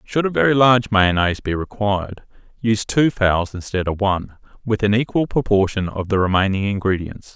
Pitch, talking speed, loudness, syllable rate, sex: 105 Hz, 170 wpm, -19 LUFS, 5.5 syllables/s, male